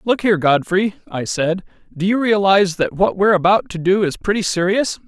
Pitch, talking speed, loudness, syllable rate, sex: 190 Hz, 200 wpm, -17 LUFS, 5.5 syllables/s, male